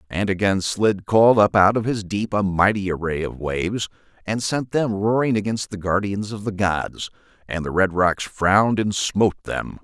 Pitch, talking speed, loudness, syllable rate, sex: 100 Hz, 195 wpm, -21 LUFS, 4.8 syllables/s, male